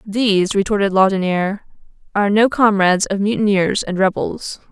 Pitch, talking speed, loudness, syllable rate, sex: 200 Hz, 125 wpm, -16 LUFS, 5.5 syllables/s, female